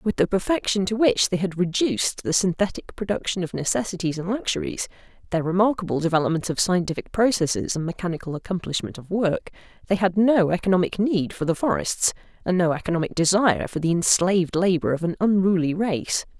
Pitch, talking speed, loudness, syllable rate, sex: 185 Hz, 170 wpm, -23 LUFS, 5.9 syllables/s, female